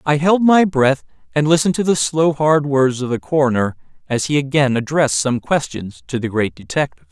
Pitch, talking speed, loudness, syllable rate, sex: 145 Hz, 200 wpm, -17 LUFS, 5.5 syllables/s, male